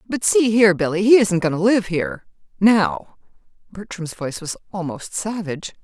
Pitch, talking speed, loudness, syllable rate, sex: 195 Hz, 155 wpm, -19 LUFS, 5.7 syllables/s, female